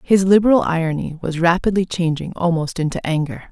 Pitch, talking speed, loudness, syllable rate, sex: 175 Hz, 155 wpm, -18 LUFS, 5.6 syllables/s, female